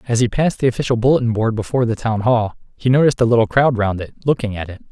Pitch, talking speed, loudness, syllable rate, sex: 115 Hz, 255 wpm, -17 LUFS, 7.4 syllables/s, male